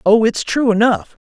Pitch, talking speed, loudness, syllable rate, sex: 230 Hz, 185 wpm, -15 LUFS, 4.7 syllables/s, female